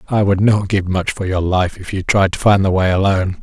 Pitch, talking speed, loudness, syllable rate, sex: 95 Hz, 280 wpm, -16 LUFS, 5.5 syllables/s, male